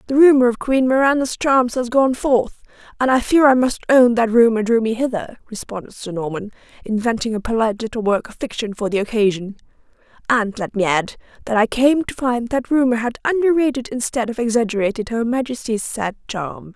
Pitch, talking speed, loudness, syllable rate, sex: 235 Hz, 195 wpm, -18 LUFS, 5.5 syllables/s, female